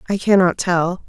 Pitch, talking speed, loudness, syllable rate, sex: 180 Hz, 165 wpm, -17 LUFS, 4.6 syllables/s, female